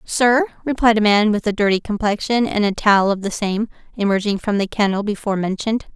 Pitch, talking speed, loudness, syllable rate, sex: 210 Hz, 200 wpm, -18 LUFS, 6.0 syllables/s, female